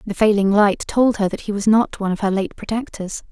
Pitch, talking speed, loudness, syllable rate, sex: 205 Hz, 255 wpm, -19 LUFS, 5.8 syllables/s, female